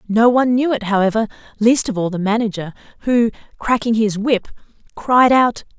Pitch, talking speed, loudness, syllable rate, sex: 225 Hz, 165 wpm, -17 LUFS, 5.3 syllables/s, female